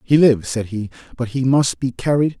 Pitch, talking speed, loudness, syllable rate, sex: 120 Hz, 225 wpm, -19 LUFS, 5.5 syllables/s, male